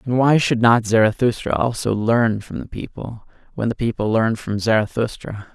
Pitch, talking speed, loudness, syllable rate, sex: 115 Hz, 175 wpm, -19 LUFS, 4.9 syllables/s, male